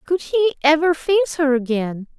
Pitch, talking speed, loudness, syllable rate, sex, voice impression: 305 Hz, 165 wpm, -18 LUFS, 4.7 syllables/s, female, very feminine, slightly young, slightly adult-like, thin, slightly relaxed, slightly weak, slightly bright, soft, slightly clear, slightly halting, very cute, intellectual, slightly refreshing, sincere, slightly calm, friendly, reassuring, unique, elegant, slightly sweet, very kind, modest